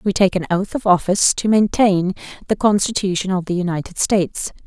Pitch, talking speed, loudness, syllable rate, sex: 190 Hz, 180 wpm, -18 LUFS, 5.6 syllables/s, female